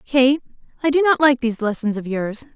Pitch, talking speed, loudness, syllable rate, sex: 255 Hz, 210 wpm, -19 LUFS, 5.6 syllables/s, female